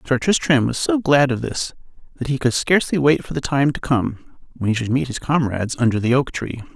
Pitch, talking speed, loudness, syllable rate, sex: 130 Hz, 240 wpm, -19 LUFS, 5.6 syllables/s, male